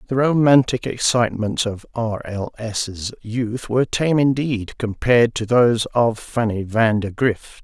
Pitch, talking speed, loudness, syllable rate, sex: 115 Hz, 150 wpm, -19 LUFS, 4.3 syllables/s, male